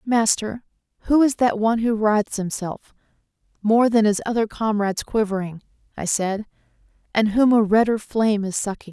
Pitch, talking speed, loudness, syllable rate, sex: 215 Hz, 155 wpm, -21 LUFS, 5.2 syllables/s, female